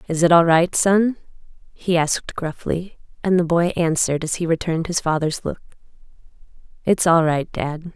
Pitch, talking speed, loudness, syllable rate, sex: 170 Hz, 150 wpm, -20 LUFS, 5.0 syllables/s, female